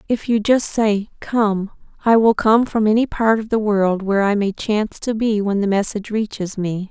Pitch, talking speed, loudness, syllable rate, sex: 210 Hz, 215 wpm, -18 LUFS, 4.9 syllables/s, female